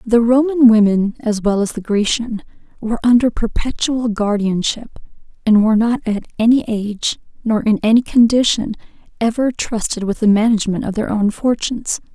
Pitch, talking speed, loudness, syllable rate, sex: 225 Hz, 155 wpm, -16 LUFS, 5.2 syllables/s, female